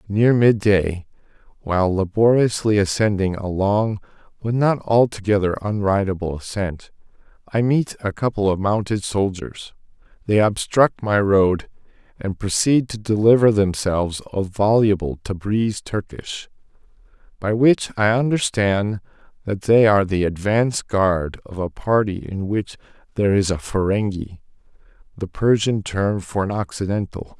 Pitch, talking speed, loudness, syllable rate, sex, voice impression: 100 Hz, 125 wpm, -20 LUFS, 4.2 syllables/s, male, masculine, adult-like, slightly clear, slightly intellectual, slightly refreshing, sincere